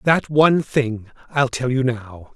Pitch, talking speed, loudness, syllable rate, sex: 130 Hz, 180 wpm, -19 LUFS, 4.2 syllables/s, male